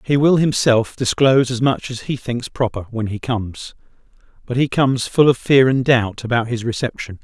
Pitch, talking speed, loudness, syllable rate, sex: 125 Hz, 200 wpm, -18 LUFS, 5.2 syllables/s, male